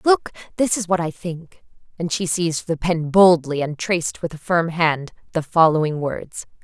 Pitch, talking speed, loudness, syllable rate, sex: 170 Hz, 190 wpm, -20 LUFS, 4.7 syllables/s, female